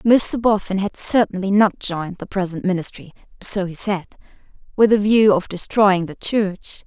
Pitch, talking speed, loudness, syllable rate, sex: 195 Hz, 150 wpm, -19 LUFS, 4.7 syllables/s, female